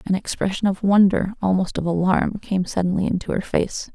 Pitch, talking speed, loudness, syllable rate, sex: 190 Hz, 185 wpm, -21 LUFS, 5.4 syllables/s, female